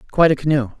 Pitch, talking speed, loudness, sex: 145 Hz, 225 wpm, -17 LUFS, male